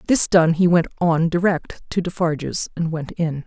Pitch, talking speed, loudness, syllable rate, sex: 170 Hz, 190 wpm, -20 LUFS, 4.6 syllables/s, female